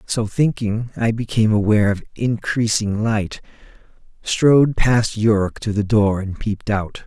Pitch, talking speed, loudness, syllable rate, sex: 110 Hz, 145 wpm, -19 LUFS, 4.5 syllables/s, male